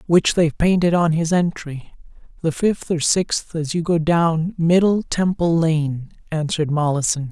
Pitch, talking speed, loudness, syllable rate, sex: 165 Hz, 150 wpm, -19 LUFS, 4.4 syllables/s, male